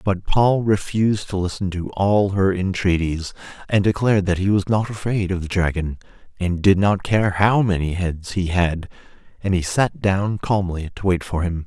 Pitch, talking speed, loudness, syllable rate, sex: 95 Hz, 190 wpm, -20 LUFS, 4.7 syllables/s, male